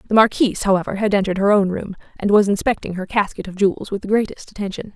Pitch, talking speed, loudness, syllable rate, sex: 200 Hz, 230 wpm, -19 LUFS, 7.1 syllables/s, female